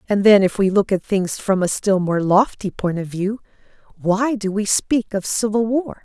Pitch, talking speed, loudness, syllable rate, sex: 205 Hz, 220 wpm, -19 LUFS, 4.6 syllables/s, female